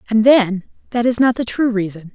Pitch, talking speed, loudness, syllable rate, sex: 220 Hz, 225 wpm, -16 LUFS, 5.4 syllables/s, female